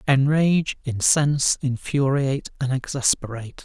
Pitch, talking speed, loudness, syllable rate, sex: 135 Hz, 80 wpm, -21 LUFS, 4.9 syllables/s, male